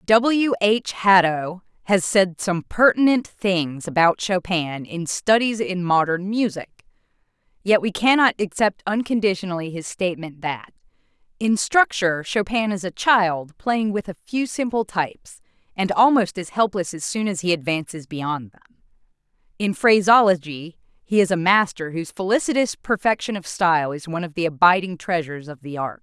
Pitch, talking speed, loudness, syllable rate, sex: 190 Hz, 150 wpm, -20 LUFS, 4.7 syllables/s, female